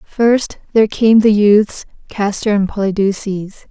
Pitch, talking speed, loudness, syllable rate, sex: 210 Hz, 130 wpm, -14 LUFS, 4.2 syllables/s, female